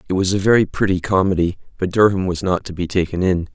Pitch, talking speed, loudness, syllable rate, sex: 95 Hz, 235 wpm, -18 LUFS, 6.4 syllables/s, male